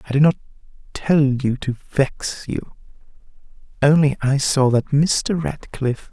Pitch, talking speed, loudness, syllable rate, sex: 140 Hz, 135 wpm, -19 LUFS, 4.3 syllables/s, male